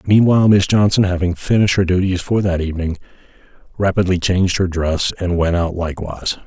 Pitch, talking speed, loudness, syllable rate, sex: 90 Hz, 165 wpm, -17 LUFS, 6.1 syllables/s, male